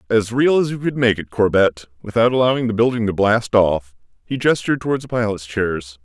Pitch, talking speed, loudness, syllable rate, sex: 110 Hz, 210 wpm, -18 LUFS, 5.6 syllables/s, male